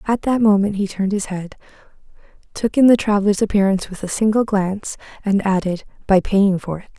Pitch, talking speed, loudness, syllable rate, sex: 200 Hz, 190 wpm, -18 LUFS, 6.0 syllables/s, female